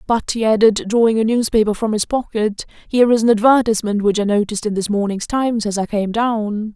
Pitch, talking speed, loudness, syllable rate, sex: 220 Hz, 215 wpm, -17 LUFS, 6.0 syllables/s, female